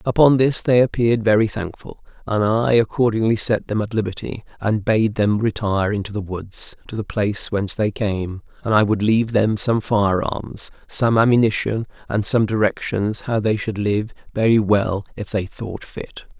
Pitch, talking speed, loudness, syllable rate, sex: 105 Hz, 180 wpm, -20 LUFS, 4.8 syllables/s, male